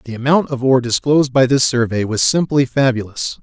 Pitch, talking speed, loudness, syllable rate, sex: 130 Hz, 195 wpm, -15 LUFS, 5.8 syllables/s, male